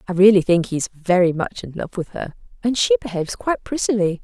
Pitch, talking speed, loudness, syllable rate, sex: 195 Hz, 225 wpm, -20 LUFS, 6.2 syllables/s, female